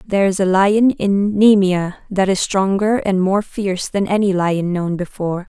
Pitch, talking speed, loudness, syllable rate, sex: 195 Hz, 185 wpm, -17 LUFS, 4.6 syllables/s, female